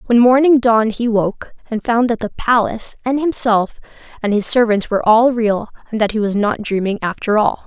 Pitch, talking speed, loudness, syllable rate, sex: 225 Hz, 205 wpm, -16 LUFS, 5.3 syllables/s, female